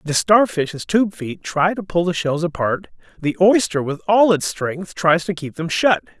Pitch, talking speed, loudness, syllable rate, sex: 175 Hz, 205 wpm, -19 LUFS, 4.4 syllables/s, male